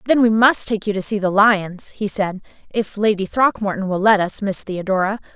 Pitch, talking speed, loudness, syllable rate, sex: 205 Hz, 215 wpm, -18 LUFS, 5.1 syllables/s, female